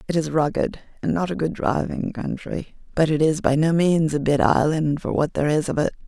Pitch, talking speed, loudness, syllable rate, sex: 155 Hz, 235 wpm, -22 LUFS, 5.4 syllables/s, female